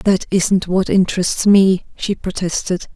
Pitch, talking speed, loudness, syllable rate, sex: 185 Hz, 140 wpm, -16 LUFS, 4.0 syllables/s, female